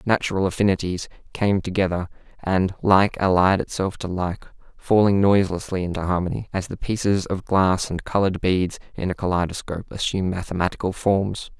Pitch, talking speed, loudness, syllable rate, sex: 95 Hz, 145 wpm, -22 LUFS, 5.5 syllables/s, male